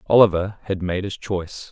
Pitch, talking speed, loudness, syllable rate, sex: 95 Hz, 175 wpm, -21 LUFS, 5.4 syllables/s, male